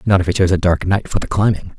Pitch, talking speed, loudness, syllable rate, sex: 95 Hz, 335 wpm, -17 LUFS, 7.1 syllables/s, male